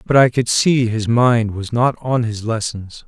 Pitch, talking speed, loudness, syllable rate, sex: 115 Hz, 215 wpm, -17 LUFS, 4.1 syllables/s, male